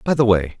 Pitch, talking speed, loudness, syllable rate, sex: 110 Hz, 300 wpm, -17 LUFS, 6.5 syllables/s, male